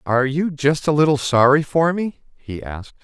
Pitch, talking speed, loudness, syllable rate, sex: 145 Hz, 195 wpm, -18 LUFS, 5.4 syllables/s, male